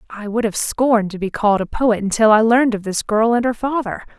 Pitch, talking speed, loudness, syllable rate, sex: 220 Hz, 260 wpm, -17 LUFS, 5.9 syllables/s, female